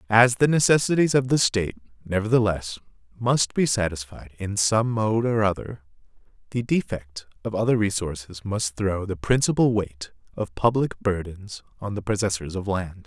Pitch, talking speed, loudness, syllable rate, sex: 105 Hz, 150 wpm, -23 LUFS, 4.9 syllables/s, male